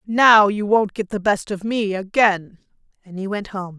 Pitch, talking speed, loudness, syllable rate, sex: 205 Hz, 205 wpm, -18 LUFS, 4.4 syllables/s, female